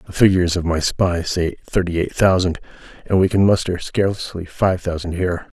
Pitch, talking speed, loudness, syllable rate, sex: 90 Hz, 180 wpm, -19 LUFS, 5.5 syllables/s, male